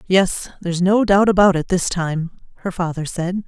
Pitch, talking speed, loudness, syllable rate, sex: 180 Hz, 190 wpm, -18 LUFS, 4.8 syllables/s, female